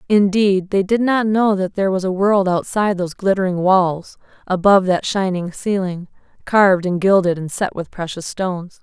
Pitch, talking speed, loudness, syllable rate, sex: 190 Hz, 175 wpm, -17 LUFS, 5.1 syllables/s, female